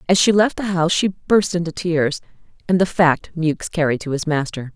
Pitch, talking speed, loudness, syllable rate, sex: 170 Hz, 215 wpm, -19 LUFS, 5.2 syllables/s, female